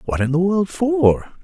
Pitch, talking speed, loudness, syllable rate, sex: 160 Hz, 210 wpm, -18 LUFS, 4.2 syllables/s, male